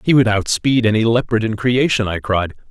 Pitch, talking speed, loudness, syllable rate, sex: 110 Hz, 200 wpm, -16 LUFS, 5.3 syllables/s, male